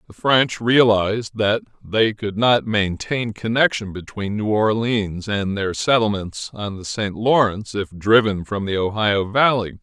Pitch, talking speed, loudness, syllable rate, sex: 105 Hz, 155 wpm, -20 LUFS, 4.2 syllables/s, male